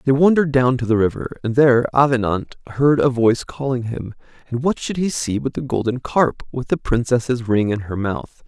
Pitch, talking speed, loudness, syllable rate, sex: 125 Hz, 210 wpm, -19 LUFS, 5.2 syllables/s, male